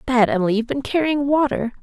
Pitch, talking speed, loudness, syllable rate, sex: 250 Hz, 195 wpm, -19 LUFS, 6.8 syllables/s, female